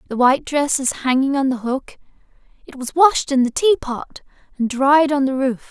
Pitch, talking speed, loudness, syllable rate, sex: 270 Hz, 200 wpm, -18 LUFS, 4.9 syllables/s, female